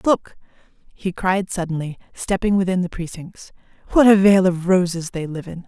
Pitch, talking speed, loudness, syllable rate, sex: 180 Hz, 170 wpm, -19 LUFS, 4.9 syllables/s, female